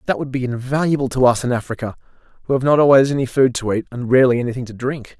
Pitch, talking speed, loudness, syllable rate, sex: 130 Hz, 245 wpm, -18 LUFS, 7.2 syllables/s, male